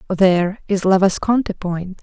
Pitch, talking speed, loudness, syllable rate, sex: 190 Hz, 150 wpm, -17 LUFS, 4.6 syllables/s, female